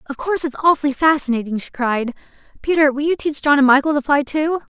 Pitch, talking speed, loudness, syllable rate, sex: 285 Hz, 215 wpm, -17 LUFS, 6.4 syllables/s, female